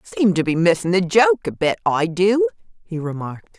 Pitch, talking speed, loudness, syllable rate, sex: 190 Hz, 185 wpm, -19 LUFS, 5.0 syllables/s, female